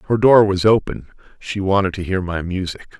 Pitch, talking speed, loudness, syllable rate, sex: 95 Hz, 200 wpm, -17 LUFS, 5.2 syllables/s, male